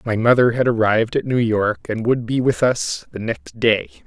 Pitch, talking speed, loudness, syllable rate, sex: 115 Hz, 220 wpm, -19 LUFS, 4.9 syllables/s, male